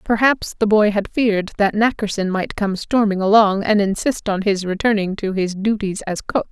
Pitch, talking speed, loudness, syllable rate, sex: 205 Hz, 195 wpm, -18 LUFS, 5.0 syllables/s, female